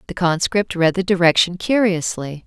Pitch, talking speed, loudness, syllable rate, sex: 180 Hz, 145 wpm, -18 LUFS, 4.8 syllables/s, female